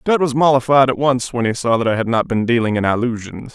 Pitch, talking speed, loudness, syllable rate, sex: 125 Hz, 270 wpm, -16 LUFS, 6.1 syllables/s, male